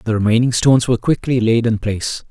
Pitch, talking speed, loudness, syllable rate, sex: 115 Hz, 210 wpm, -16 LUFS, 6.6 syllables/s, male